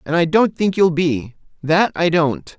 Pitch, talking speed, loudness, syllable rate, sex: 165 Hz, 210 wpm, -17 LUFS, 4.2 syllables/s, male